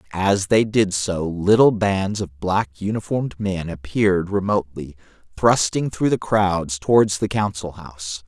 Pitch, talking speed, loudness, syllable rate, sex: 95 Hz, 150 wpm, -20 LUFS, 4.5 syllables/s, male